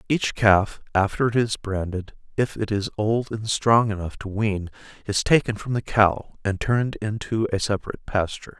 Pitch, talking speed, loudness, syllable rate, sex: 105 Hz, 180 wpm, -23 LUFS, 4.9 syllables/s, male